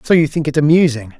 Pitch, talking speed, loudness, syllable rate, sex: 145 Hz, 250 wpm, -14 LUFS, 6.4 syllables/s, male